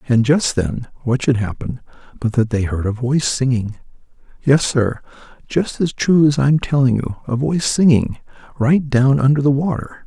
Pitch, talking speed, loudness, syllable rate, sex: 130 Hz, 180 wpm, -17 LUFS, 4.9 syllables/s, male